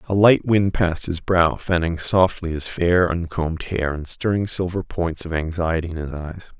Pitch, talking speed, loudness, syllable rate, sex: 85 Hz, 190 wpm, -21 LUFS, 4.7 syllables/s, male